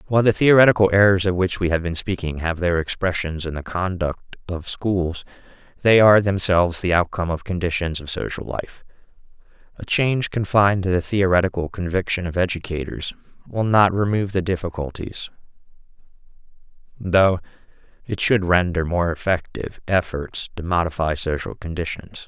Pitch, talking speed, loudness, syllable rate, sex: 90 Hz, 145 wpm, -21 LUFS, 5.4 syllables/s, male